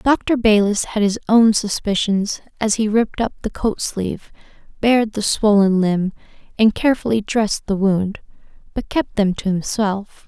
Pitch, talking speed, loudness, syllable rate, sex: 210 Hz, 160 wpm, -18 LUFS, 4.6 syllables/s, female